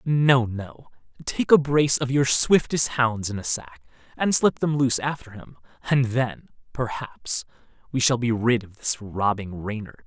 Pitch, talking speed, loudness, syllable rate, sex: 120 Hz, 175 wpm, -23 LUFS, 4.4 syllables/s, male